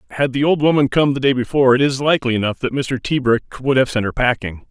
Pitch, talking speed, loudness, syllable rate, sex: 130 Hz, 255 wpm, -17 LUFS, 6.3 syllables/s, male